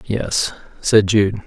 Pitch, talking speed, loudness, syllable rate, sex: 105 Hz, 125 wpm, -17 LUFS, 2.7 syllables/s, male